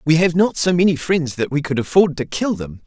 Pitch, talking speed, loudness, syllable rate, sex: 160 Hz, 270 wpm, -18 LUFS, 5.5 syllables/s, male